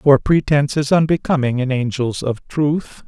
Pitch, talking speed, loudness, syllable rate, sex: 140 Hz, 155 wpm, -18 LUFS, 4.6 syllables/s, male